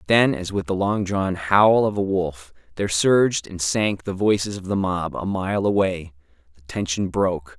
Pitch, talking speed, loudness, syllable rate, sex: 95 Hz, 200 wpm, -21 LUFS, 4.6 syllables/s, male